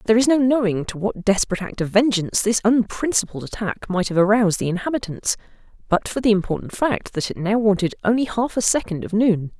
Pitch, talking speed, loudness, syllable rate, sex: 210 Hz, 205 wpm, -20 LUFS, 6.2 syllables/s, female